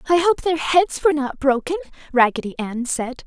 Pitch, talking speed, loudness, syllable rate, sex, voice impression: 295 Hz, 185 wpm, -20 LUFS, 5.3 syllables/s, female, feminine, adult-like, powerful, slightly cute, slightly unique, slightly intense